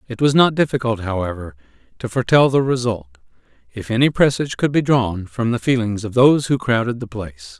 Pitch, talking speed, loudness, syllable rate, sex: 115 Hz, 190 wpm, -18 LUFS, 5.9 syllables/s, male